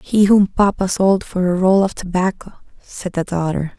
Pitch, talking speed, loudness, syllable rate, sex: 185 Hz, 190 wpm, -17 LUFS, 4.7 syllables/s, female